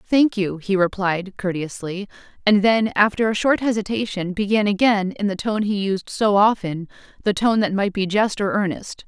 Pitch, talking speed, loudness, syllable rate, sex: 200 Hz, 180 wpm, -20 LUFS, 4.8 syllables/s, female